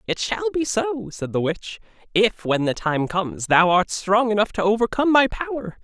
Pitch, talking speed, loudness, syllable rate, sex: 195 Hz, 205 wpm, -21 LUFS, 5.0 syllables/s, male